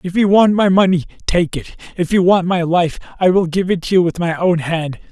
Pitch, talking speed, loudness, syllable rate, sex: 180 Hz, 260 wpm, -15 LUFS, 5.3 syllables/s, male